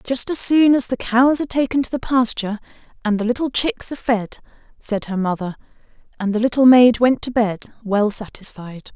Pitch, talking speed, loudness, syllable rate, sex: 235 Hz, 195 wpm, -18 LUFS, 5.4 syllables/s, female